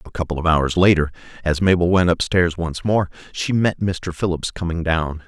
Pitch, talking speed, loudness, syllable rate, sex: 85 Hz, 195 wpm, -20 LUFS, 5.0 syllables/s, male